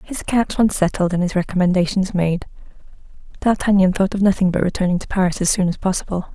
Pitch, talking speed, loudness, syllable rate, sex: 190 Hz, 190 wpm, -18 LUFS, 6.5 syllables/s, female